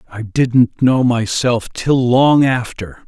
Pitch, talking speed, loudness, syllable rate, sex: 120 Hz, 135 wpm, -15 LUFS, 3.2 syllables/s, male